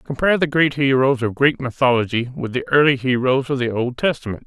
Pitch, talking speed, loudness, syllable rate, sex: 130 Hz, 200 wpm, -18 LUFS, 5.9 syllables/s, male